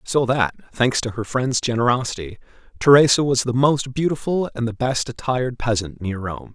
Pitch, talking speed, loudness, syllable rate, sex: 125 Hz, 175 wpm, -20 LUFS, 5.1 syllables/s, male